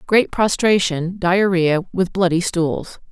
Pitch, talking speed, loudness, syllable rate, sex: 180 Hz, 115 wpm, -18 LUFS, 3.6 syllables/s, female